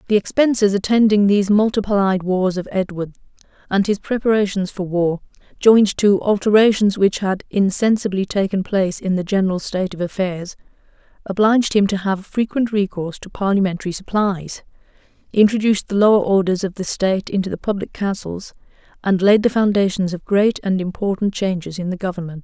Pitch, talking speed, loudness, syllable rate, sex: 195 Hz, 160 wpm, -18 LUFS, 5.6 syllables/s, female